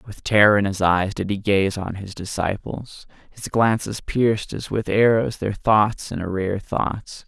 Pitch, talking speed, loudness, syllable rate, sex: 100 Hz, 180 wpm, -21 LUFS, 4.2 syllables/s, male